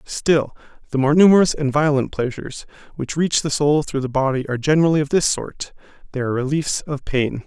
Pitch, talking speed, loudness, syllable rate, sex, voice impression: 145 Hz, 185 wpm, -19 LUFS, 5.8 syllables/s, male, masculine, adult-like, slightly thin, tensed, powerful, bright, clear, fluent, cool, intellectual, slightly refreshing, calm, friendly, reassuring, slightly wild, lively, slightly strict